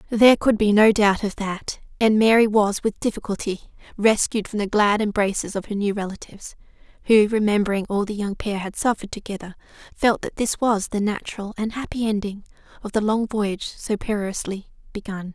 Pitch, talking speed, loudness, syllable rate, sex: 210 Hz, 180 wpm, -22 LUFS, 5.6 syllables/s, female